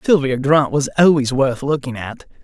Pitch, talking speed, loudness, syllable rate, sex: 140 Hz, 175 wpm, -16 LUFS, 4.7 syllables/s, male